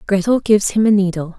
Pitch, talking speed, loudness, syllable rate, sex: 200 Hz, 215 wpm, -15 LUFS, 6.5 syllables/s, female